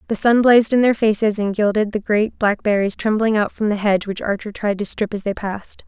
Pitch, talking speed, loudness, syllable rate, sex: 210 Hz, 245 wpm, -18 LUFS, 5.8 syllables/s, female